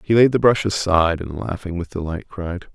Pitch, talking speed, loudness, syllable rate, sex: 95 Hz, 220 wpm, -20 LUFS, 5.4 syllables/s, male